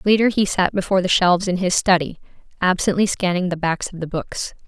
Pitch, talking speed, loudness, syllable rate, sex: 185 Hz, 205 wpm, -19 LUFS, 5.9 syllables/s, female